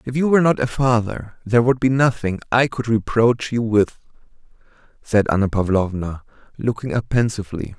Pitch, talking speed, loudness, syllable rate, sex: 115 Hz, 160 wpm, -19 LUFS, 5.4 syllables/s, male